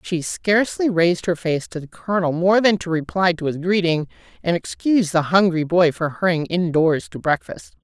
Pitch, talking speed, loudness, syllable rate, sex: 175 Hz, 190 wpm, -19 LUFS, 5.2 syllables/s, female